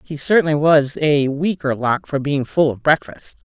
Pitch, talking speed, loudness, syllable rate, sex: 145 Hz, 190 wpm, -17 LUFS, 4.6 syllables/s, female